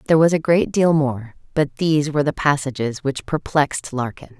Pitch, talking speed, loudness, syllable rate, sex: 145 Hz, 190 wpm, -20 LUFS, 5.6 syllables/s, female